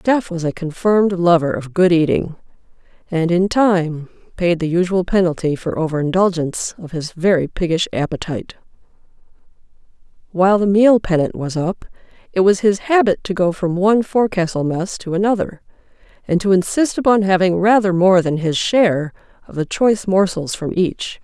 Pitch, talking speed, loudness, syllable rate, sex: 180 Hz, 165 wpm, -17 LUFS, 5.2 syllables/s, female